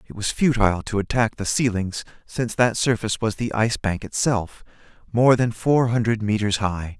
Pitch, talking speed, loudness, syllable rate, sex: 110 Hz, 180 wpm, -22 LUFS, 5.3 syllables/s, male